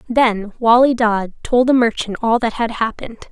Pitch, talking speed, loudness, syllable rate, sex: 230 Hz, 180 wpm, -16 LUFS, 5.0 syllables/s, female